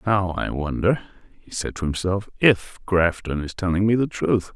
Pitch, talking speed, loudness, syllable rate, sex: 95 Hz, 185 wpm, -22 LUFS, 4.7 syllables/s, male